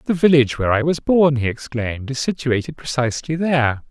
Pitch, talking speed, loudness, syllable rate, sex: 135 Hz, 185 wpm, -19 LUFS, 6.2 syllables/s, male